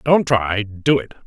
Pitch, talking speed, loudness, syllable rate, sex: 120 Hz, 140 wpm, -18 LUFS, 3.9 syllables/s, male